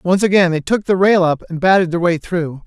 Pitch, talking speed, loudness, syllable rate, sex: 180 Hz, 270 wpm, -15 LUFS, 5.8 syllables/s, male